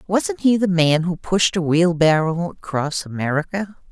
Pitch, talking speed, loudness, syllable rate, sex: 175 Hz, 155 wpm, -19 LUFS, 4.4 syllables/s, female